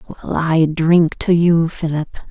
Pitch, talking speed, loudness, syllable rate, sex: 165 Hz, 155 wpm, -16 LUFS, 4.0 syllables/s, female